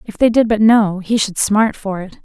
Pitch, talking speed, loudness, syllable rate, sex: 210 Hz, 270 wpm, -15 LUFS, 4.7 syllables/s, female